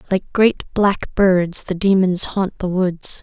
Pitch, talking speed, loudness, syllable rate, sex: 185 Hz, 170 wpm, -18 LUFS, 3.6 syllables/s, female